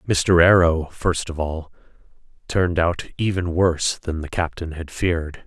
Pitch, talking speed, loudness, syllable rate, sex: 85 Hz, 155 wpm, -21 LUFS, 4.6 syllables/s, male